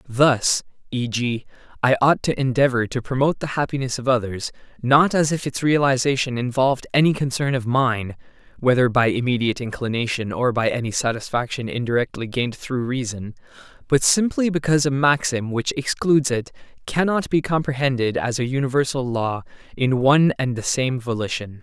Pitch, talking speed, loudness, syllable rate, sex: 130 Hz, 155 wpm, -21 LUFS, 4.3 syllables/s, male